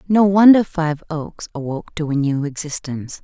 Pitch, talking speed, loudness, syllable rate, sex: 160 Hz, 165 wpm, -18 LUFS, 5.1 syllables/s, female